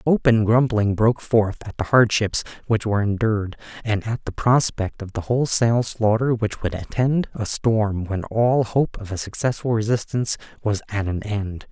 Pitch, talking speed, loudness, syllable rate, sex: 110 Hz, 175 wpm, -21 LUFS, 4.9 syllables/s, male